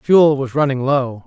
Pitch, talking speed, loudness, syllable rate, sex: 135 Hz, 190 wpm, -16 LUFS, 4.1 syllables/s, male